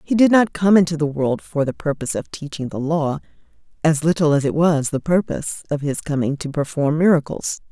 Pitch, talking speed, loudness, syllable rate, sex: 155 Hz, 210 wpm, -19 LUFS, 5.6 syllables/s, female